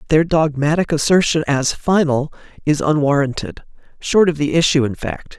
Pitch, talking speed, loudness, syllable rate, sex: 150 Hz, 145 wpm, -17 LUFS, 5.0 syllables/s, male